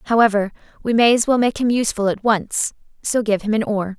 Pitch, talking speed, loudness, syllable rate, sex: 220 Hz, 225 wpm, -19 LUFS, 5.7 syllables/s, female